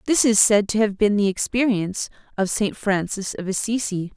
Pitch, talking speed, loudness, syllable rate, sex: 205 Hz, 190 wpm, -21 LUFS, 5.2 syllables/s, female